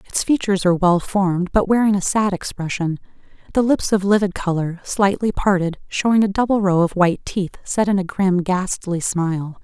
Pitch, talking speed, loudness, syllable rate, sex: 190 Hz, 185 wpm, -19 LUFS, 5.3 syllables/s, female